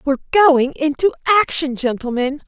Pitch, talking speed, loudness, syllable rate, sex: 290 Hz, 120 wpm, -16 LUFS, 5.3 syllables/s, female